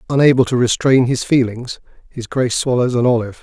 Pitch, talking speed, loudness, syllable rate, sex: 125 Hz, 175 wpm, -15 LUFS, 6.1 syllables/s, male